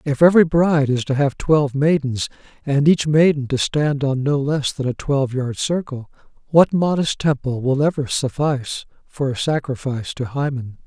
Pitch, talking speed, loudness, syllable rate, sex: 140 Hz, 175 wpm, -19 LUFS, 5.0 syllables/s, male